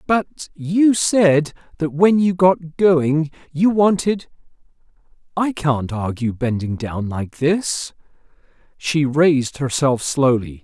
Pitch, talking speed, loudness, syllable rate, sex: 155 Hz, 120 wpm, -18 LUFS, 3.4 syllables/s, male